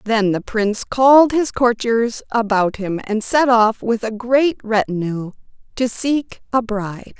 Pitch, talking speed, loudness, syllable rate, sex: 230 Hz, 160 wpm, -17 LUFS, 4.0 syllables/s, female